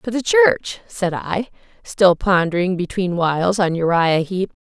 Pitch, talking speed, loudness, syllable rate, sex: 180 Hz, 155 wpm, -18 LUFS, 4.1 syllables/s, female